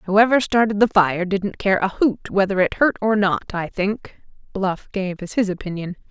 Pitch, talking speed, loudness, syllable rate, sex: 200 Hz, 195 wpm, -20 LUFS, 4.7 syllables/s, female